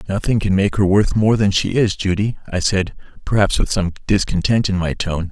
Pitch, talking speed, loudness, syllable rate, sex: 100 Hz, 215 wpm, -18 LUFS, 5.3 syllables/s, male